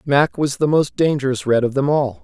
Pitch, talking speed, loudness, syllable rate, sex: 140 Hz, 240 wpm, -18 LUFS, 5.2 syllables/s, male